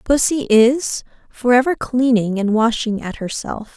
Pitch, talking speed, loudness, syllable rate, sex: 235 Hz, 145 wpm, -17 LUFS, 4.1 syllables/s, female